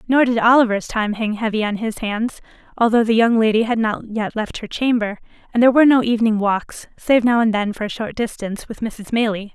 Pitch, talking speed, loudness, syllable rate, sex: 225 Hz, 225 wpm, -18 LUFS, 5.8 syllables/s, female